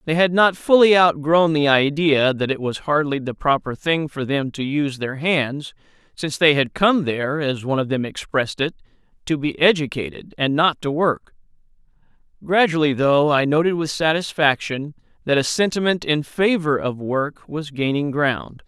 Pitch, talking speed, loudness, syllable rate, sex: 150 Hz, 175 wpm, -19 LUFS, 4.8 syllables/s, male